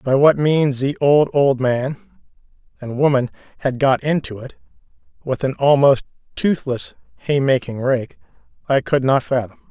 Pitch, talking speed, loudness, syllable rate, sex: 135 Hz, 150 wpm, -18 LUFS, 4.5 syllables/s, male